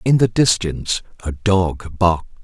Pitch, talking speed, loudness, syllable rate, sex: 90 Hz, 150 wpm, -18 LUFS, 4.5 syllables/s, male